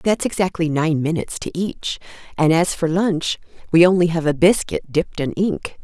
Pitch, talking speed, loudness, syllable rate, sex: 170 Hz, 185 wpm, -19 LUFS, 5.0 syllables/s, female